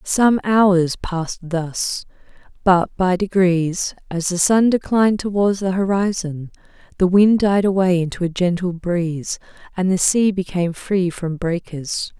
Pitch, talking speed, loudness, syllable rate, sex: 185 Hz, 145 wpm, -18 LUFS, 4.1 syllables/s, female